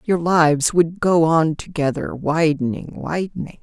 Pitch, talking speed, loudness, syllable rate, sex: 160 Hz, 130 wpm, -19 LUFS, 4.3 syllables/s, female